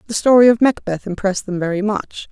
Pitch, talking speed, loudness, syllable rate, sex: 205 Hz, 210 wpm, -16 LUFS, 6.1 syllables/s, female